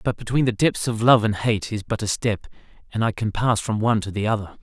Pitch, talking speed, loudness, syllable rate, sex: 110 Hz, 275 wpm, -22 LUFS, 5.9 syllables/s, male